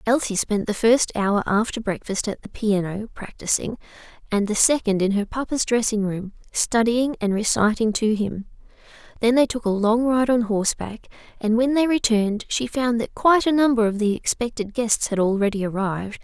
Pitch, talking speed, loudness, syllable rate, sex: 225 Hz, 180 wpm, -21 LUFS, 5.1 syllables/s, female